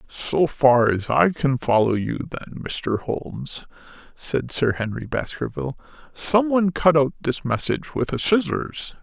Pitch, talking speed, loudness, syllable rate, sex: 140 Hz, 145 wpm, -22 LUFS, 4.3 syllables/s, male